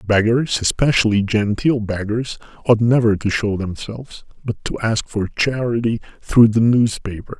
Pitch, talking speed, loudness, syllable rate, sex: 110 Hz, 140 wpm, -18 LUFS, 4.6 syllables/s, male